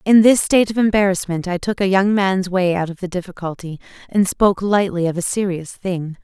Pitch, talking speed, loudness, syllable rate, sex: 185 Hz, 210 wpm, -18 LUFS, 5.5 syllables/s, female